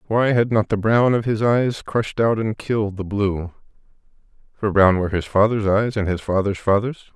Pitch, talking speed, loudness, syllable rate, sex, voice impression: 105 Hz, 195 wpm, -20 LUFS, 5.2 syllables/s, male, masculine, middle-aged, thick, tensed, powerful, slightly hard, muffled, cool, intellectual, mature, wild, lively, slightly strict